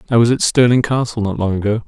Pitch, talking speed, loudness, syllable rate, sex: 115 Hz, 255 wpm, -15 LUFS, 6.8 syllables/s, male